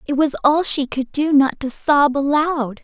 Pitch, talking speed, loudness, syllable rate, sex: 285 Hz, 210 wpm, -17 LUFS, 4.2 syllables/s, female